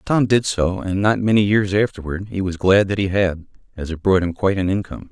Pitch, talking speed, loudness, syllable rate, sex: 95 Hz, 245 wpm, -19 LUFS, 5.8 syllables/s, male